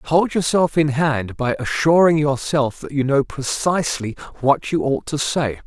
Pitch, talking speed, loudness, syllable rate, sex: 145 Hz, 170 wpm, -19 LUFS, 4.4 syllables/s, male